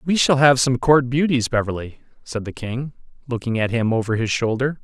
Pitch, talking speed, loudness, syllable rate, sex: 125 Hz, 200 wpm, -20 LUFS, 5.2 syllables/s, male